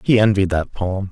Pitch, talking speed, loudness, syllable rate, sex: 100 Hz, 215 wpm, -18 LUFS, 5.0 syllables/s, male